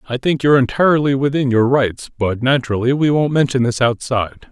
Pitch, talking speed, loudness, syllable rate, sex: 130 Hz, 185 wpm, -16 LUFS, 6.2 syllables/s, male